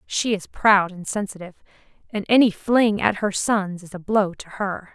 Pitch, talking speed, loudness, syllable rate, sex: 200 Hz, 195 wpm, -21 LUFS, 4.6 syllables/s, female